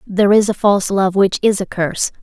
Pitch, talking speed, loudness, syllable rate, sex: 195 Hz, 245 wpm, -15 LUFS, 6.0 syllables/s, female